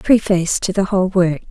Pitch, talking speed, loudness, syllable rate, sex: 190 Hz, 200 wpm, -16 LUFS, 6.1 syllables/s, female